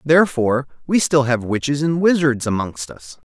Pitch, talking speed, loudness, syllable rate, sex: 135 Hz, 165 wpm, -18 LUFS, 5.1 syllables/s, male